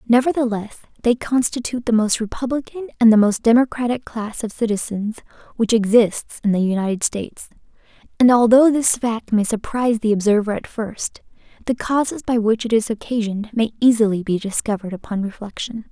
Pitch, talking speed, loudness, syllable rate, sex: 225 Hz, 160 wpm, -19 LUFS, 5.7 syllables/s, female